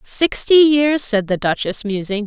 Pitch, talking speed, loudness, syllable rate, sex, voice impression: 240 Hz, 160 wpm, -16 LUFS, 4.2 syllables/s, female, feminine, adult-like, tensed, powerful, clear, fluent, intellectual, friendly, lively, intense, sharp